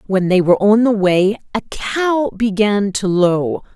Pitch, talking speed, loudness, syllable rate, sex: 205 Hz, 175 wpm, -16 LUFS, 4.0 syllables/s, female